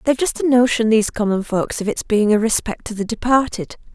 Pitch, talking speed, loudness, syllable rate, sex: 225 Hz, 230 wpm, -18 LUFS, 6.0 syllables/s, female